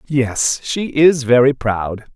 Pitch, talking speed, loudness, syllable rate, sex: 130 Hz, 140 wpm, -16 LUFS, 3.2 syllables/s, male